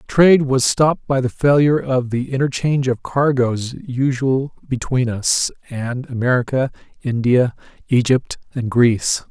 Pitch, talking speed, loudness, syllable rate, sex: 130 Hz, 130 wpm, -18 LUFS, 4.5 syllables/s, male